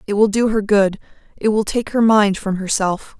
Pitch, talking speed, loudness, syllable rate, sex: 205 Hz, 205 wpm, -17 LUFS, 4.9 syllables/s, female